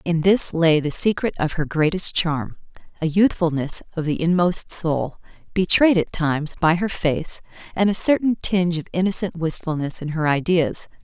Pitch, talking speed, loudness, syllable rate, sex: 170 Hz, 170 wpm, -20 LUFS, 4.8 syllables/s, female